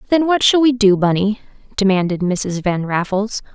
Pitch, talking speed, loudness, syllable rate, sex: 210 Hz, 170 wpm, -16 LUFS, 4.9 syllables/s, female